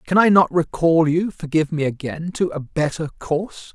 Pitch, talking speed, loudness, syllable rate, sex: 165 Hz, 160 wpm, -20 LUFS, 5.3 syllables/s, male